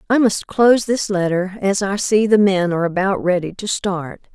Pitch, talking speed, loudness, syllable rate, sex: 195 Hz, 205 wpm, -17 LUFS, 4.9 syllables/s, female